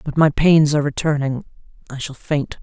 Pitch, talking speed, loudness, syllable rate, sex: 145 Hz, 185 wpm, -18 LUFS, 5.4 syllables/s, female